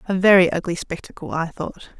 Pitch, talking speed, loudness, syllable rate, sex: 180 Hz, 180 wpm, -19 LUFS, 5.5 syllables/s, female